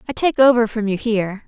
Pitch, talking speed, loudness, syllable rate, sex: 225 Hz, 245 wpm, -17 LUFS, 6.1 syllables/s, female